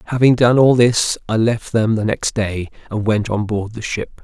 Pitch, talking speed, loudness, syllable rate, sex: 110 Hz, 225 wpm, -17 LUFS, 4.6 syllables/s, male